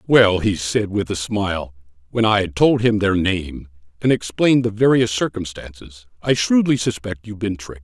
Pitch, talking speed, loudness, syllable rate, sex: 100 Hz, 185 wpm, -19 LUFS, 5.1 syllables/s, male